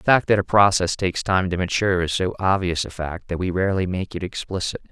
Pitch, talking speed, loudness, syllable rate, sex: 90 Hz, 245 wpm, -21 LUFS, 6.1 syllables/s, male